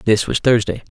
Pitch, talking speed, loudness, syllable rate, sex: 115 Hz, 190 wpm, -17 LUFS, 4.9 syllables/s, male